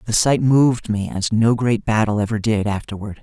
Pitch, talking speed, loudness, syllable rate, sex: 110 Hz, 205 wpm, -18 LUFS, 5.2 syllables/s, male